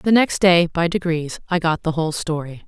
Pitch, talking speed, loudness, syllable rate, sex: 170 Hz, 225 wpm, -19 LUFS, 5.3 syllables/s, female